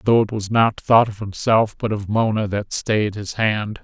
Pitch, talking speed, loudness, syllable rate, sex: 105 Hz, 220 wpm, -19 LUFS, 4.4 syllables/s, male